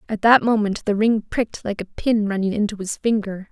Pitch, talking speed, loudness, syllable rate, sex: 210 Hz, 220 wpm, -20 LUFS, 5.4 syllables/s, female